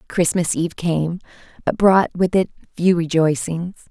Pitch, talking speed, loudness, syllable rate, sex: 170 Hz, 140 wpm, -19 LUFS, 4.5 syllables/s, female